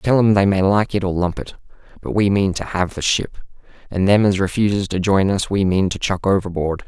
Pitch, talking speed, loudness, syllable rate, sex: 95 Hz, 245 wpm, -18 LUFS, 5.4 syllables/s, male